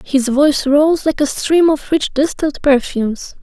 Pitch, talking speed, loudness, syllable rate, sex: 285 Hz, 175 wpm, -15 LUFS, 4.6 syllables/s, female